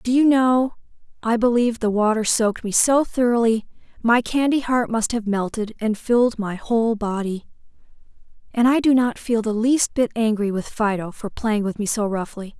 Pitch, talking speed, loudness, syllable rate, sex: 225 Hz, 185 wpm, -20 LUFS, 5.0 syllables/s, female